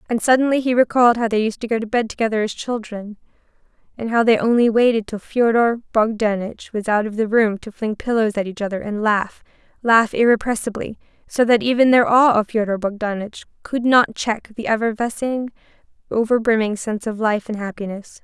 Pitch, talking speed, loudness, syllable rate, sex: 225 Hz, 185 wpm, -19 LUFS, 5.6 syllables/s, female